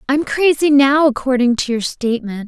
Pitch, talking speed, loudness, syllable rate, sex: 265 Hz, 170 wpm, -15 LUFS, 5.1 syllables/s, female